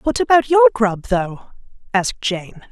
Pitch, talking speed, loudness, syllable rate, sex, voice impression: 230 Hz, 155 wpm, -17 LUFS, 4.5 syllables/s, female, very feminine, adult-like, slightly clear, intellectual, slightly sharp